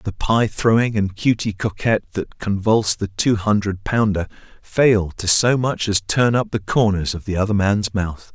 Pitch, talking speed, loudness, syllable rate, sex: 105 Hz, 185 wpm, -19 LUFS, 4.6 syllables/s, male